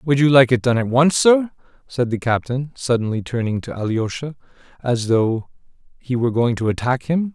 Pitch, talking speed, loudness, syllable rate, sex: 125 Hz, 190 wpm, -19 LUFS, 5.2 syllables/s, male